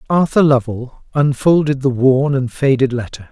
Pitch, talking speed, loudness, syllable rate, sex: 135 Hz, 145 wpm, -15 LUFS, 4.6 syllables/s, male